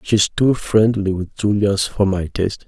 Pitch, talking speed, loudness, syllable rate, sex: 100 Hz, 180 wpm, -18 LUFS, 4.4 syllables/s, male